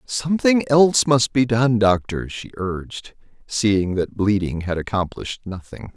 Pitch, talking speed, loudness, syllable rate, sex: 110 Hz, 140 wpm, -20 LUFS, 4.4 syllables/s, male